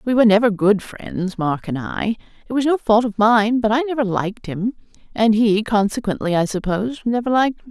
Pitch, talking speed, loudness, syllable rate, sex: 220 Hz, 210 wpm, -19 LUFS, 5.5 syllables/s, female